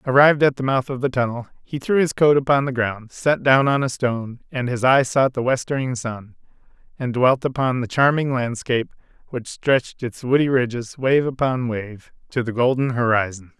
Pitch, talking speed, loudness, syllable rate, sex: 130 Hz, 195 wpm, -20 LUFS, 5.2 syllables/s, male